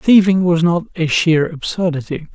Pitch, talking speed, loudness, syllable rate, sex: 170 Hz, 155 wpm, -16 LUFS, 4.6 syllables/s, male